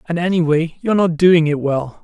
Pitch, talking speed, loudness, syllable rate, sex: 165 Hz, 205 wpm, -16 LUFS, 5.3 syllables/s, male